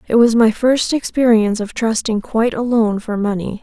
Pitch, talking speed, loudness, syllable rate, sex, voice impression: 225 Hz, 180 wpm, -16 LUFS, 5.4 syllables/s, female, very feminine, slightly young, very thin, relaxed, weak, dark, very soft, very clear, very fluent, very cute, intellectual, very refreshing, sincere, very calm, very friendly, very reassuring, very unique, very elegant, very sweet, very kind, very modest